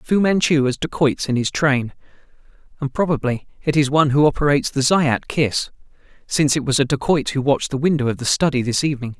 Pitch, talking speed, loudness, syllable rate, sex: 140 Hz, 200 wpm, -19 LUFS, 6.1 syllables/s, male